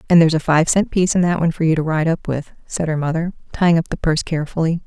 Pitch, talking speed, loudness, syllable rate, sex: 160 Hz, 285 wpm, -18 LUFS, 7.5 syllables/s, female